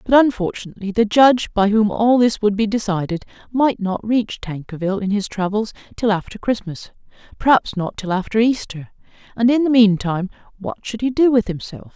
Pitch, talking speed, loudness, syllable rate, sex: 215 Hz, 180 wpm, -18 LUFS, 5.5 syllables/s, female